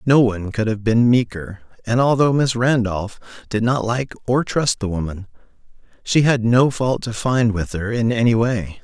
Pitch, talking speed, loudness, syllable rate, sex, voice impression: 115 Hz, 190 wpm, -19 LUFS, 4.7 syllables/s, male, masculine, adult-like, slightly bright, soft, raspy, cool, friendly, reassuring, kind, modest